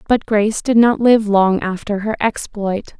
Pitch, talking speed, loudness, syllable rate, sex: 215 Hz, 180 wpm, -16 LUFS, 4.5 syllables/s, female